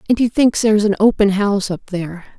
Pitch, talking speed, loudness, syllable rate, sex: 205 Hz, 225 wpm, -16 LUFS, 6.3 syllables/s, female